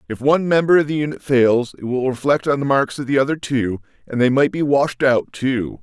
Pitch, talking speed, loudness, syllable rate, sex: 135 Hz, 245 wpm, -18 LUFS, 5.4 syllables/s, male